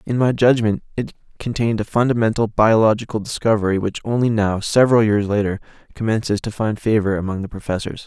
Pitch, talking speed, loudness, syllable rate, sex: 110 Hz, 165 wpm, -19 LUFS, 6.1 syllables/s, male